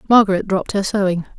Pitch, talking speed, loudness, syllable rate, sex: 195 Hz, 175 wpm, -18 LUFS, 7.2 syllables/s, female